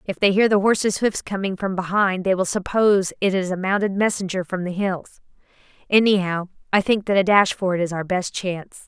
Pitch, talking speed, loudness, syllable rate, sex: 190 Hz, 215 wpm, -20 LUFS, 5.5 syllables/s, female